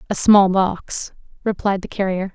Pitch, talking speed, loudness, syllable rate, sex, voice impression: 195 Hz, 155 wpm, -18 LUFS, 4.4 syllables/s, female, feminine, young, slightly weak, slightly soft, cute, calm, friendly, kind, modest